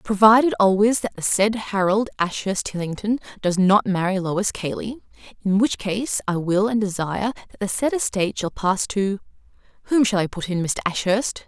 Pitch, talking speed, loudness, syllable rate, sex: 205 Hz, 175 wpm, -21 LUFS, 5.1 syllables/s, female